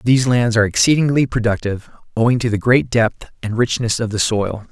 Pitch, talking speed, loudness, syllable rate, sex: 115 Hz, 190 wpm, -17 LUFS, 5.9 syllables/s, male